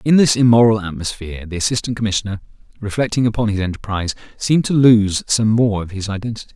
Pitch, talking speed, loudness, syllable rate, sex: 110 Hz, 175 wpm, -17 LUFS, 6.7 syllables/s, male